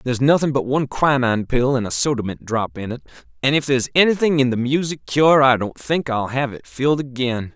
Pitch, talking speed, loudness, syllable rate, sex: 130 Hz, 230 wpm, -19 LUFS, 5.9 syllables/s, male